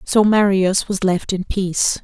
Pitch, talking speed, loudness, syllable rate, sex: 195 Hz, 175 wpm, -17 LUFS, 4.2 syllables/s, female